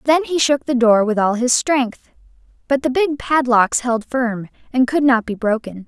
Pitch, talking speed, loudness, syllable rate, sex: 250 Hz, 205 wpm, -17 LUFS, 4.4 syllables/s, female